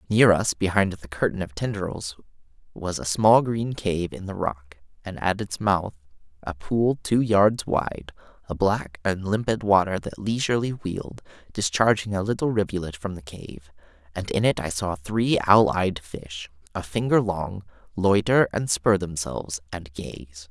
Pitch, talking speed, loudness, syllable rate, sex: 95 Hz, 165 wpm, -24 LUFS, 4.4 syllables/s, male